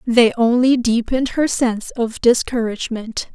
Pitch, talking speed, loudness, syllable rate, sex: 235 Hz, 125 wpm, -18 LUFS, 4.8 syllables/s, female